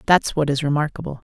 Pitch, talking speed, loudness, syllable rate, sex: 150 Hz, 185 wpm, -20 LUFS, 6.4 syllables/s, female